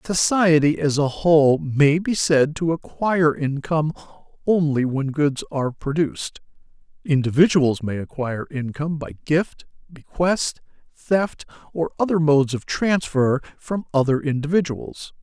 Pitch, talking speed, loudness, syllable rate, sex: 150 Hz, 120 wpm, -21 LUFS, 4.5 syllables/s, male